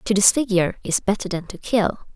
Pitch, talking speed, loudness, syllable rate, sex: 200 Hz, 195 wpm, -21 LUFS, 5.7 syllables/s, female